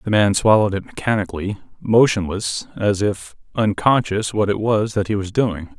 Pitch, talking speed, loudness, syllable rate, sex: 105 Hz, 165 wpm, -19 LUFS, 5.0 syllables/s, male